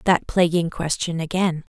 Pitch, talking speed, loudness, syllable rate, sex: 170 Hz, 140 wpm, -22 LUFS, 4.5 syllables/s, female